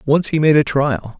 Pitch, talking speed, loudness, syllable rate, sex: 140 Hz, 250 wpm, -16 LUFS, 4.8 syllables/s, male